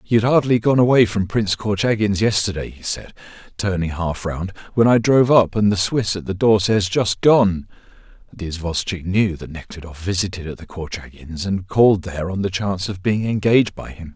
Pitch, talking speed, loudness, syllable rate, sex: 100 Hz, 200 wpm, -19 LUFS, 5.4 syllables/s, male